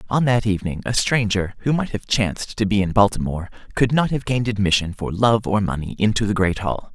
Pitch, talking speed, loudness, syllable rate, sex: 105 Hz, 225 wpm, -20 LUFS, 6.0 syllables/s, male